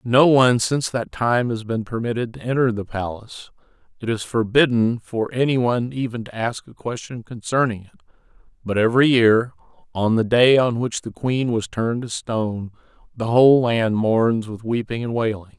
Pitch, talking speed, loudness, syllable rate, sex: 115 Hz, 175 wpm, -20 LUFS, 5.2 syllables/s, male